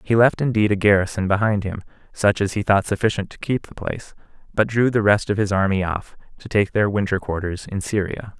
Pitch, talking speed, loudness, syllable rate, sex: 105 Hz, 220 wpm, -21 LUFS, 5.7 syllables/s, male